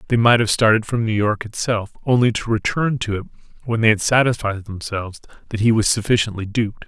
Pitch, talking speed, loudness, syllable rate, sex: 110 Hz, 190 wpm, -19 LUFS, 6.0 syllables/s, male